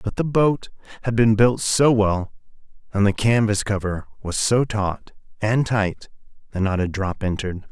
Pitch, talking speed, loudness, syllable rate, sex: 105 Hz, 170 wpm, -21 LUFS, 4.5 syllables/s, male